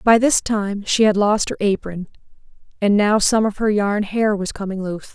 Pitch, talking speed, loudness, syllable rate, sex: 205 Hz, 210 wpm, -18 LUFS, 4.9 syllables/s, female